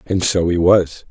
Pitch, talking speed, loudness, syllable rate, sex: 90 Hz, 215 wpm, -15 LUFS, 4.1 syllables/s, male